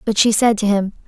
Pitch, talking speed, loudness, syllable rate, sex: 215 Hz, 280 wpm, -16 LUFS, 5.8 syllables/s, female